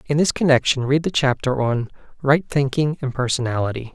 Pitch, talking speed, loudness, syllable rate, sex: 135 Hz, 165 wpm, -20 LUFS, 5.5 syllables/s, male